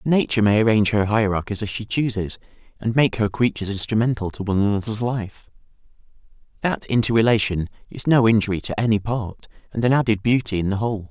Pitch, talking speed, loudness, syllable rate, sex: 110 Hz, 175 wpm, -21 LUFS, 6.3 syllables/s, male